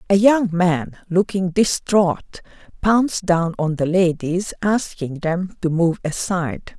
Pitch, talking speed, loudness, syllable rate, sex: 180 Hz, 135 wpm, -19 LUFS, 3.7 syllables/s, female